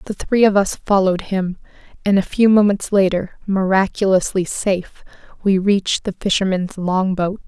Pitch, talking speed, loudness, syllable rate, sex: 195 Hz, 145 wpm, -18 LUFS, 4.9 syllables/s, female